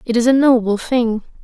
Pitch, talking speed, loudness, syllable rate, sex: 235 Hz, 210 wpm, -15 LUFS, 5.1 syllables/s, female